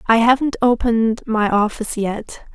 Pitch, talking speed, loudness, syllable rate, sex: 230 Hz, 140 wpm, -18 LUFS, 4.9 syllables/s, female